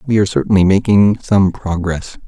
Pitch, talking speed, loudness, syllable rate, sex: 100 Hz, 160 wpm, -14 LUFS, 5.4 syllables/s, male